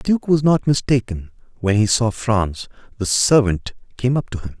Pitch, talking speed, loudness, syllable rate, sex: 115 Hz, 195 wpm, -18 LUFS, 4.8 syllables/s, male